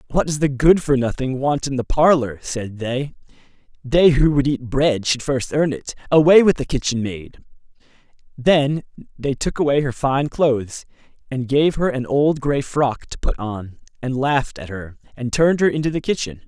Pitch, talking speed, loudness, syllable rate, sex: 135 Hz, 195 wpm, -19 LUFS, 4.7 syllables/s, male